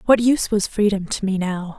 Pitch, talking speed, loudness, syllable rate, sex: 205 Hz, 235 wpm, -20 LUFS, 5.5 syllables/s, female